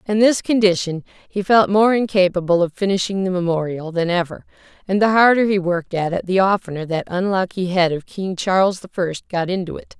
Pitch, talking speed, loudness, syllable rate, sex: 185 Hz, 200 wpm, -18 LUFS, 5.6 syllables/s, female